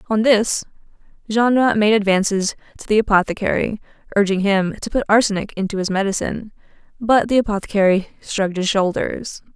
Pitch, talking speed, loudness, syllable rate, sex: 205 Hz, 140 wpm, -18 LUFS, 5.6 syllables/s, female